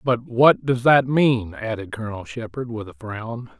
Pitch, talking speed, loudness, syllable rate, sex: 115 Hz, 185 wpm, -21 LUFS, 4.6 syllables/s, male